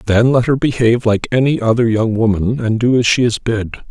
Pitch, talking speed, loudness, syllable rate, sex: 115 Hz, 230 wpm, -14 LUFS, 5.6 syllables/s, male